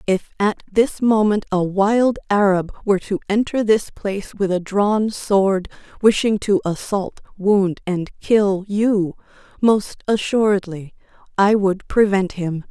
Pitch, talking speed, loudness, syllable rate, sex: 200 Hz, 135 wpm, -19 LUFS, 3.9 syllables/s, female